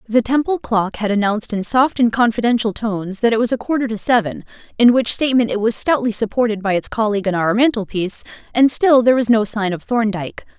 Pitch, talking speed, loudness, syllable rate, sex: 225 Hz, 215 wpm, -17 LUFS, 6.2 syllables/s, female